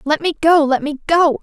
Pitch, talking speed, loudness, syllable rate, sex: 300 Hz, 255 wpm, -15 LUFS, 5.1 syllables/s, female